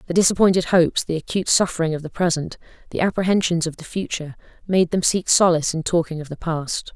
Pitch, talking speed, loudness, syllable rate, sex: 170 Hz, 200 wpm, -20 LUFS, 6.6 syllables/s, female